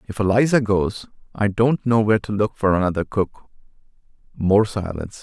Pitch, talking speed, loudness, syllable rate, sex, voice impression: 105 Hz, 160 wpm, -20 LUFS, 5.2 syllables/s, male, masculine, very adult-like, sincere, slightly mature, elegant, slightly wild